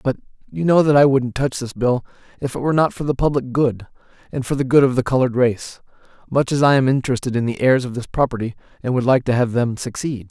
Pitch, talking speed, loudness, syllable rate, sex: 130 Hz, 250 wpm, -19 LUFS, 6.4 syllables/s, male